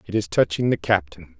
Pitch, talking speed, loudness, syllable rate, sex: 110 Hz, 215 wpm, -21 LUFS, 5.5 syllables/s, male